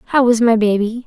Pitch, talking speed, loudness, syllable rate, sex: 230 Hz, 225 wpm, -14 LUFS, 4.9 syllables/s, female